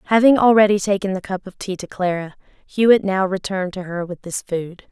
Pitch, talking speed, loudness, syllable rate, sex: 190 Hz, 205 wpm, -19 LUFS, 5.6 syllables/s, female